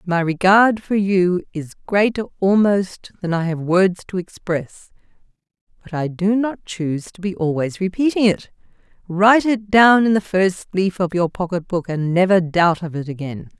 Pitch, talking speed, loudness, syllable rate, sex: 185 Hz, 175 wpm, -18 LUFS, 4.5 syllables/s, female